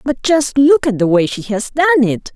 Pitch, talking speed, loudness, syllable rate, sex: 260 Hz, 255 wpm, -14 LUFS, 4.8 syllables/s, female